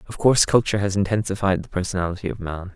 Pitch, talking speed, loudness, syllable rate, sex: 95 Hz, 195 wpm, -22 LUFS, 7.3 syllables/s, male